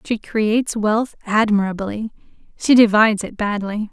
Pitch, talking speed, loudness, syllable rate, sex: 215 Hz, 120 wpm, -18 LUFS, 4.6 syllables/s, female